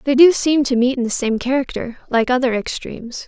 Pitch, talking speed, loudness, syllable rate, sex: 255 Hz, 220 wpm, -17 LUFS, 5.6 syllables/s, female